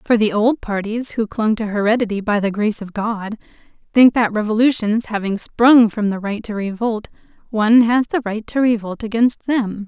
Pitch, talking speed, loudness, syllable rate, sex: 220 Hz, 190 wpm, -17 LUFS, 5.0 syllables/s, female